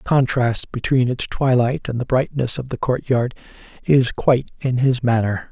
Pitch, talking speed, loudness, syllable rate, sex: 125 Hz, 175 wpm, -19 LUFS, 4.8 syllables/s, male